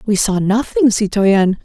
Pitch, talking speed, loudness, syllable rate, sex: 205 Hz, 145 wpm, -14 LUFS, 4.1 syllables/s, female